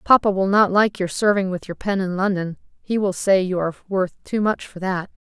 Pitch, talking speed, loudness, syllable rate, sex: 190 Hz, 240 wpm, -21 LUFS, 5.5 syllables/s, female